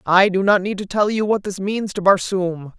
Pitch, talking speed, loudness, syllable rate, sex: 195 Hz, 260 wpm, -19 LUFS, 4.9 syllables/s, female